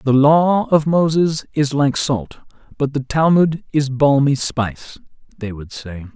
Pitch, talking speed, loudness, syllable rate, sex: 140 Hz, 155 wpm, -17 LUFS, 3.9 syllables/s, male